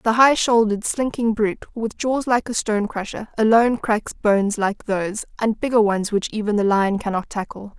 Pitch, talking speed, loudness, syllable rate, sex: 215 Hz, 195 wpm, -20 LUFS, 5.3 syllables/s, female